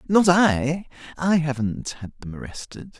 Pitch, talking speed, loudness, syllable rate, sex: 155 Hz, 120 wpm, -22 LUFS, 4.2 syllables/s, male